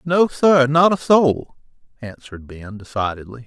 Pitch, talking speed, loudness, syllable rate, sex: 135 Hz, 140 wpm, -17 LUFS, 4.5 syllables/s, male